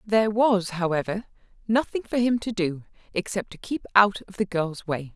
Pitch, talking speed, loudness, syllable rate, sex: 200 Hz, 185 wpm, -25 LUFS, 5.0 syllables/s, female